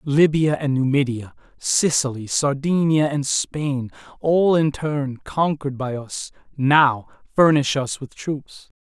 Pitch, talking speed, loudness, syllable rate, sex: 140 Hz, 120 wpm, -20 LUFS, 3.7 syllables/s, male